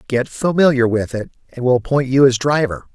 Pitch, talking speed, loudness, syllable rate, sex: 130 Hz, 205 wpm, -16 LUFS, 5.6 syllables/s, male